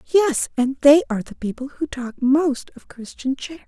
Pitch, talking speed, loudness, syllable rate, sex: 275 Hz, 195 wpm, -20 LUFS, 5.2 syllables/s, female